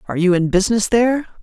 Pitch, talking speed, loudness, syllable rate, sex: 205 Hz, 210 wpm, -16 LUFS, 8.0 syllables/s, female